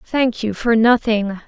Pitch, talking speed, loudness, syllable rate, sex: 225 Hz, 165 wpm, -17 LUFS, 3.7 syllables/s, female